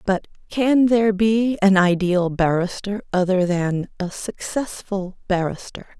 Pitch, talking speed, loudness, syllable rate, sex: 195 Hz, 120 wpm, -20 LUFS, 4.1 syllables/s, female